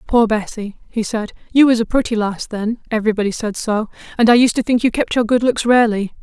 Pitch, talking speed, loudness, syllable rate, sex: 225 Hz, 210 wpm, -17 LUFS, 6.0 syllables/s, female